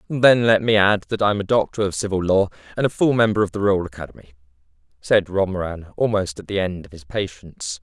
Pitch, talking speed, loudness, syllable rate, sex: 100 Hz, 215 wpm, -20 LUFS, 5.9 syllables/s, male